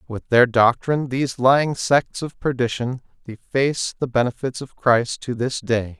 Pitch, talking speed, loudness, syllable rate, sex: 125 Hz, 160 wpm, -20 LUFS, 4.7 syllables/s, male